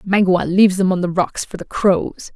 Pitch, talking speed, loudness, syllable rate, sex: 185 Hz, 230 wpm, -17 LUFS, 5.0 syllables/s, female